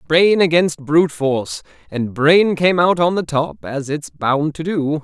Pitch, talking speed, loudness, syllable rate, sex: 150 Hz, 165 wpm, -17 LUFS, 4.1 syllables/s, male